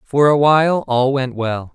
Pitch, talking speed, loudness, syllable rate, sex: 135 Hz, 205 wpm, -16 LUFS, 4.2 syllables/s, male